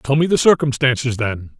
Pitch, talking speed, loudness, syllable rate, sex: 130 Hz, 190 wpm, -17 LUFS, 5.2 syllables/s, male